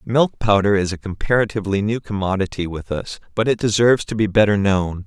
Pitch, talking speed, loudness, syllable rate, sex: 105 Hz, 190 wpm, -19 LUFS, 5.8 syllables/s, male